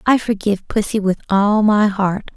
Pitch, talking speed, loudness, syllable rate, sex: 205 Hz, 180 wpm, -17 LUFS, 4.7 syllables/s, female